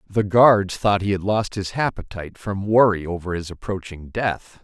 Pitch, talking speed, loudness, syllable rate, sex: 100 Hz, 180 wpm, -21 LUFS, 4.7 syllables/s, male